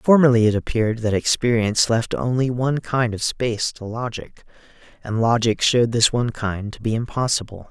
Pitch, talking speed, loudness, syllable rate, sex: 115 Hz, 170 wpm, -20 LUFS, 5.5 syllables/s, male